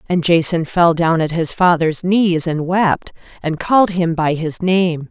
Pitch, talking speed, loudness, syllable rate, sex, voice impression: 170 Hz, 190 wpm, -16 LUFS, 4.1 syllables/s, female, feminine, adult-like, tensed, slightly hard, intellectual, calm, reassuring, elegant, slightly lively, slightly sharp